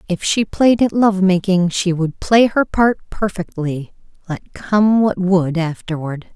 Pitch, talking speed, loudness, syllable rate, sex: 190 Hz, 160 wpm, -16 LUFS, 3.9 syllables/s, female